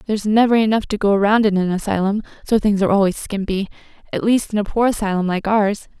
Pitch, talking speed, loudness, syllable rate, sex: 205 Hz, 220 wpm, -18 LUFS, 6.7 syllables/s, female